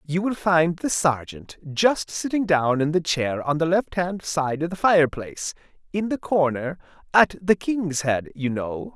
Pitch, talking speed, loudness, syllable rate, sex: 160 Hz, 180 wpm, -23 LUFS, 4.2 syllables/s, male